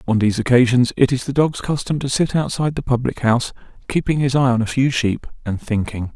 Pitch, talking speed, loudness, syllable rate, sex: 125 Hz, 225 wpm, -19 LUFS, 6.0 syllables/s, male